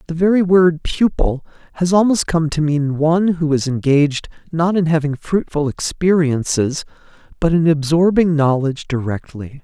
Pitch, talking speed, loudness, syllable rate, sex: 160 Hz, 145 wpm, -16 LUFS, 4.8 syllables/s, male